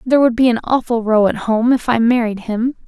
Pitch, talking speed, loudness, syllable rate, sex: 235 Hz, 250 wpm, -15 LUFS, 5.6 syllables/s, female